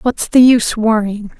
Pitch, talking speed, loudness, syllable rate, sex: 225 Hz, 170 wpm, -12 LUFS, 4.8 syllables/s, female